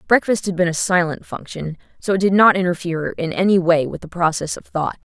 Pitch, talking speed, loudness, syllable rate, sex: 175 Hz, 225 wpm, -19 LUFS, 5.8 syllables/s, female